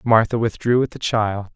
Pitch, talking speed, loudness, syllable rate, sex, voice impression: 110 Hz, 195 wpm, -20 LUFS, 5.1 syllables/s, male, very masculine, middle-aged, thick, tensed, slightly powerful, bright, slightly soft, clear, fluent, slightly raspy, cool, very intellectual, very refreshing, sincere, calm, very friendly, very reassuring, unique, elegant, slightly wild, sweet, lively, kind